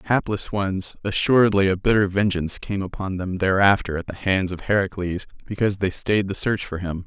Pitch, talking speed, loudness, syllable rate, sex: 95 Hz, 185 wpm, -22 LUFS, 5.5 syllables/s, male